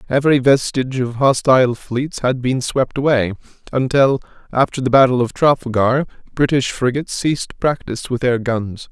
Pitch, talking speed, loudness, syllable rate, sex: 130 Hz, 150 wpm, -17 LUFS, 5.2 syllables/s, male